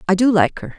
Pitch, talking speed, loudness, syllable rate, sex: 205 Hz, 305 wpm, -16 LUFS, 6.4 syllables/s, female